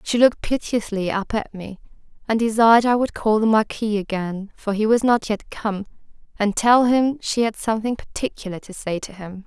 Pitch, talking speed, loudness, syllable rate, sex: 215 Hz, 195 wpm, -20 LUFS, 5.2 syllables/s, female